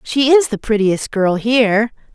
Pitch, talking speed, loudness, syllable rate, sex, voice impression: 225 Hz, 170 wpm, -15 LUFS, 4.3 syllables/s, female, very feminine, adult-like, slightly middle-aged, thin, slightly tensed, slightly powerful, bright, hard, very clear, very fluent, cute, intellectual, slightly refreshing, sincere, slightly calm, friendly, slightly reassuring, very unique, slightly elegant, slightly wild, lively, kind, sharp